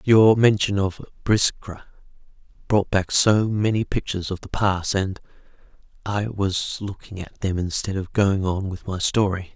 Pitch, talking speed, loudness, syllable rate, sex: 100 Hz, 150 wpm, -22 LUFS, 4.3 syllables/s, male